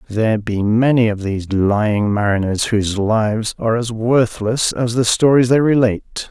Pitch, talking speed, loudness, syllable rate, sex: 110 Hz, 160 wpm, -16 LUFS, 4.9 syllables/s, male